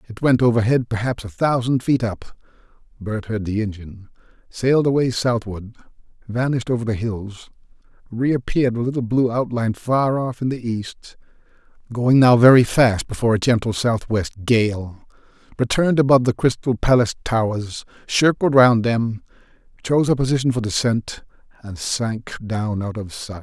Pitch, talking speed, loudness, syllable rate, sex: 115 Hz, 150 wpm, -19 LUFS, 5.0 syllables/s, male